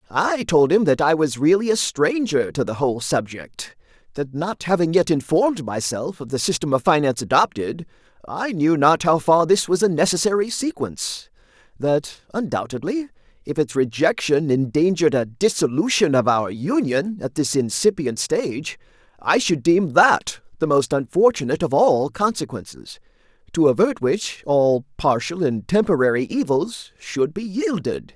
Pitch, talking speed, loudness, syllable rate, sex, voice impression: 160 Hz, 150 wpm, -20 LUFS, 4.8 syllables/s, male, very masculine, very adult-like, middle-aged, thick, very tensed, powerful, bright, very hard, very clear, very fluent, slightly raspy, cool, very intellectual, very refreshing, sincere, slightly mature, slightly friendly, slightly reassuring, very unique, slightly elegant, wild, slightly lively, strict, intense